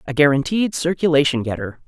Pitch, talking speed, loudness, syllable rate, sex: 145 Hz, 130 wpm, -18 LUFS, 5.9 syllables/s, female